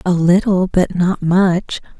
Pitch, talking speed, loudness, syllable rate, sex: 180 Hz, 150 wpm, -15 LUFS, 3.5 syllables/s, female